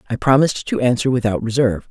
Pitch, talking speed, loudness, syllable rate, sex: 120 Hz, 190 wpm, -17 LUFS, 7.0 syllables/s, female